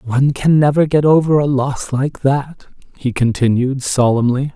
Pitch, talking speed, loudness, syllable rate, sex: 135 Hz, 160 wpm, -15 LUFS, 4.5 syllables/s, male